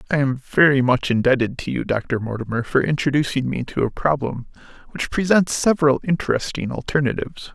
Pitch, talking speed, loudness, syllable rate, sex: 135 Hz, 160 wpm, -20 LUFS, 5.7 syllables/s, male